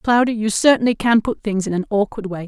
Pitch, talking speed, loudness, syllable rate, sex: 215 Hz, 240 wpm, -18 LUFS, 5.8 syllables/s, female